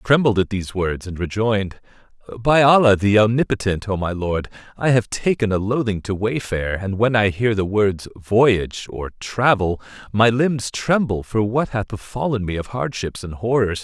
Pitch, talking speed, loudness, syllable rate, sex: 110 Hz, 180 wpm, -20 LUFS, 4.9 syllables/s, male